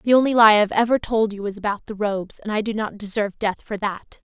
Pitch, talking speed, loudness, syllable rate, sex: 210 Hz, 280 wpm, -21 LUFS, 6.3 syllables/s, female